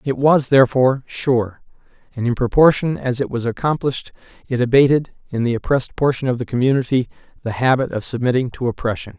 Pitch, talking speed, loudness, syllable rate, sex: 130 Hz, 170 wpm, -18 LUFS, 6.1 syllables/s, male